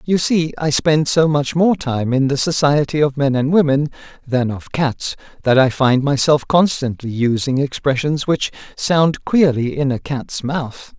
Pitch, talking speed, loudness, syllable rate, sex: 140 Hz, 175 wpm, -17 LUFS, 4.2 syllables/s, male